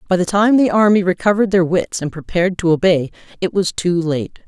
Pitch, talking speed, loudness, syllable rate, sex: 185 Hz, 215 wpm, -16 LUFS, 5.8 syllables/s, female